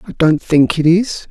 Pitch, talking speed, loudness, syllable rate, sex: 165 Hz, 230 wpm, -13 LUFS, 4.2 syllables/s, male